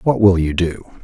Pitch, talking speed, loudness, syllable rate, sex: 95 Hz, 235 wpm, -16 LUFS, 5.0 syllables/s, male